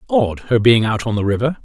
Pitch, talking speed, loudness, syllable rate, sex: 120 Hz, 255 wpm, -16 LUFS, 5.6 syllables/s, male